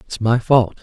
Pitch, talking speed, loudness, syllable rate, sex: 115 Hz, 220 wpm, -17 LUFS, 4.2 syllables/s, female